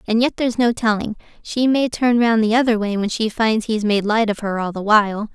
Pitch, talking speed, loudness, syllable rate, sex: 220 Hz, 245 wpm, -18 LUFS, 5.5 syllables/s, female